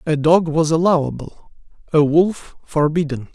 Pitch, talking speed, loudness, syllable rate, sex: 160 Hz, 125 wpm, -17 LUFS, 4.4 syllables/s, male